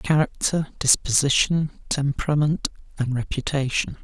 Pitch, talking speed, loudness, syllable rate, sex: 145 Hz, 75 wpm, -22 LUFS, 4.7 syllables/s, male